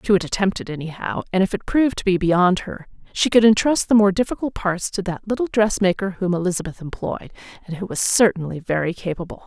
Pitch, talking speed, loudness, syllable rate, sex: 190 Hz, 210 wpm, -20 LUFS, 6.0 syllables/s, female